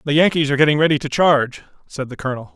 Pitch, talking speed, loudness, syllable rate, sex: 145 Hz, 235 wpm, -17 LUFS, 7.7 syllables/s, male